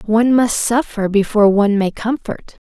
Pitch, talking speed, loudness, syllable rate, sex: 220 Hz, 155 wpm, -15 LUFS, 5.4 syllables/s, female